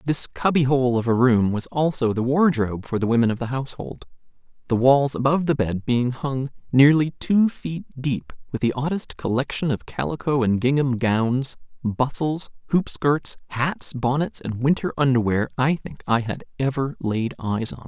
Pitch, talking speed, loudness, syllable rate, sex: 130 Hz, 170 wpm, -22 LUFS, 4.8 syllables/s, male